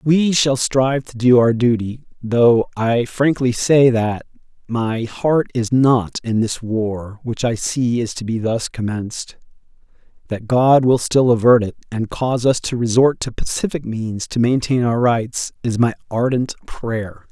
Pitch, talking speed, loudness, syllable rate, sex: 120 Hz, 170 wpm, -18 LUFS, 4.1 syllables/s, male